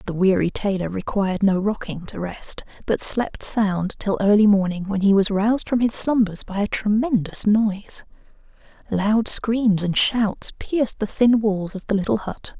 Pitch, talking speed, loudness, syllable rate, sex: 205 Hz, 175 wpm, -21 LUFS, 4.5 syllables/s, female